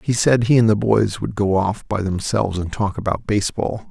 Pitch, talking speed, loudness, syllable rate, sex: 105 Hz, 230 wpm, -19 LUFS, 5.3 syllables/s, male